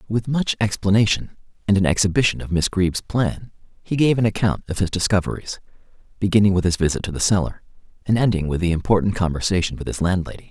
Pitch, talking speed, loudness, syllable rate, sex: 95 Hz, 190 wpm, -20 LUFS, 6.3 syllables/s, male